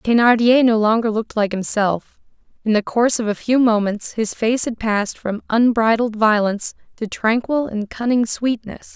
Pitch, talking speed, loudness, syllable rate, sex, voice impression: 225 Hz, 170 wpm, -18 LUFS, 4.9 syllables/s, female, feminine, adult-like, tensed, powerful, bright, clear, fluent, intellectual, calm, friendly, elegant, lively